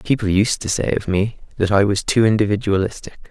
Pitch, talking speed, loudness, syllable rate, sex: 105 Hz, 200 wpm, -18 LUFS, 5.6 syllables/s, male